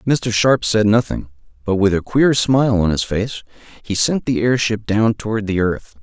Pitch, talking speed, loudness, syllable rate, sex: 110 Hz, 200 wpm, -17 LUFS, 4.6 syllables/s, male